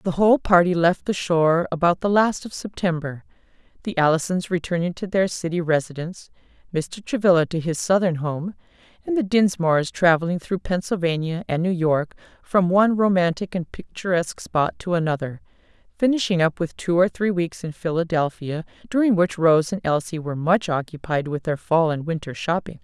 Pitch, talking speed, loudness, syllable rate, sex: 175 Hz, 170 wpm, -22 LUFS, 5.4 syllables/s, female